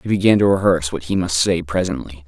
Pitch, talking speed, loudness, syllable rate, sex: 85 Hz, 235 wpm, -18 LUFS, 6.3 syllables/s, male